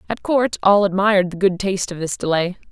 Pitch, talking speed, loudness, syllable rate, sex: 190 Hz, 220 wpm, -18 LUFS, 5.9 syllables/s, female